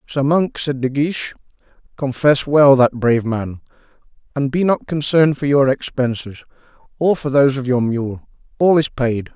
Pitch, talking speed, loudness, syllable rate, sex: 135 Hz, 165 wpm, -17 LUFS, 4.9 syllables/s, male